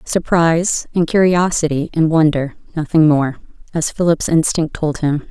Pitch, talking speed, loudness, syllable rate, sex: 160 Hz, 135 wpm, -16 LUFS, 4.6 syllables/s, female